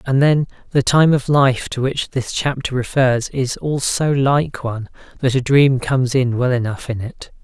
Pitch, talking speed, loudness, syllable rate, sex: 130 Hz, 200 wpm, -17 LUFS, 4.5 syllables/s, male